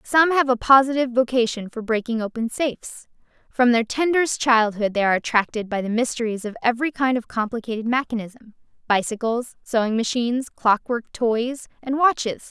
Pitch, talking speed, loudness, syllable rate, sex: 240 Hz, 155 wpm, -21 LUFS, 5.4 syllables/s, female